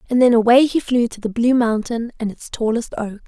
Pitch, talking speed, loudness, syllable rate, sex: 235 Hz, 240 wpm, -18 LUFS, 5.5 syllables/s, female